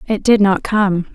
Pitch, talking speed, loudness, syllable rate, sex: 200 Hz, 210 wpm, -15 LUFS, 4.1 syllables/s, female